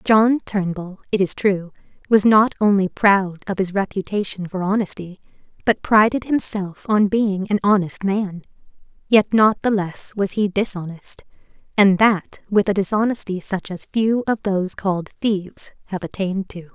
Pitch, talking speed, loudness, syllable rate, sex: 200 Hz, 155 wpm, -19 LUFS, 4.6 syllables/s, female